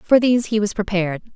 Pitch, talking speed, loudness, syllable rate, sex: 210 Hz, 220 wpm, -19 LUFS, 7.0 syllables/s, female